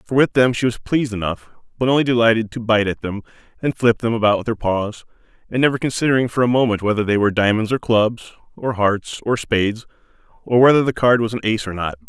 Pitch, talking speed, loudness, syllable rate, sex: 115 Hz, 230 wpm, -18 LUFS, 6.4 syllables/s, male